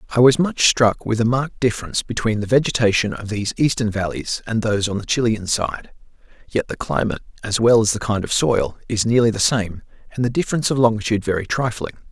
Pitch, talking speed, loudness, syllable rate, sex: 115 Hz, 210 wpm, -19 LUFS, 6.3 syllables/s, male